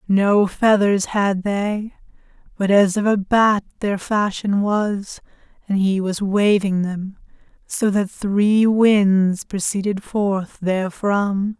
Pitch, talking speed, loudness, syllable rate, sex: 200 Hz, 125 wpm, -19 LUFS, 3.2 syllables/s, female